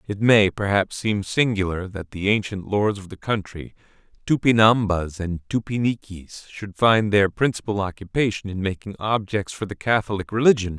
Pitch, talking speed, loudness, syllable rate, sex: 100 Hz, 150 wpm, -22 LUFS, 4.9 syllables/s, male